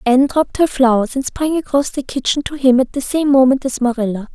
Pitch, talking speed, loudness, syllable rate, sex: 265 Hz, 235 wpm, -16 LUFS, 5.9 syllables/s, female